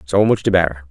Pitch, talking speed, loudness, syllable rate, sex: 90 Hz, 265 wpm, -16 LUFS, 6.5 syllables/s, male